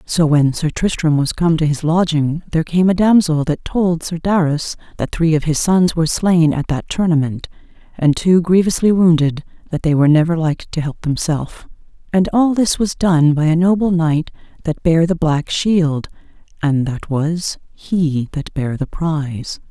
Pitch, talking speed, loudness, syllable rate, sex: 165 Hz, 185 wpm, -16 LUFS, 4.6 syllables/s, female